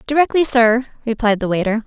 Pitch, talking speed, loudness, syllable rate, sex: 235 Hz, 160 wpm, -16 LUFS, 5.8 syllables/s, female